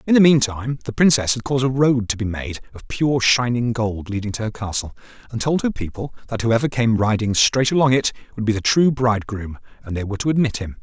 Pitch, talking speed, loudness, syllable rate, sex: 120 Hz, 235 wpm, -19 LUFS, 6.0 syllables/s, male